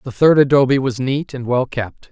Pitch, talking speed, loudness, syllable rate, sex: 130 Hz, 225 wpm, -16 LUFS, 5.0 syllables/s, male